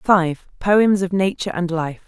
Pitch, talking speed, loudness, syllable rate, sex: 180 Hz, 175 wpm, -19 LUFS, 5.6 syllables/s, female